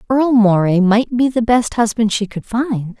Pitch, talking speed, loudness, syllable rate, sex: 225 Hz, 200 wpm, -15 LUFS, 4.7 syllables/s, female